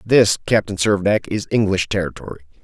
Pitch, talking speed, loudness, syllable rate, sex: 100 Hz, 135 wpm, -18 LUFS, 6.1 syllables/s, male